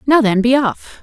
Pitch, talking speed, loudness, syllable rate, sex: 240 Hz, 235 wpm, -14 LUFS, 4.6 syllables/s, female